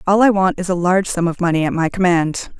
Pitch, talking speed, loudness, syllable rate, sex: 180 Hz, 275 wpm, -17 LUFS, 6.2 syllables/s, female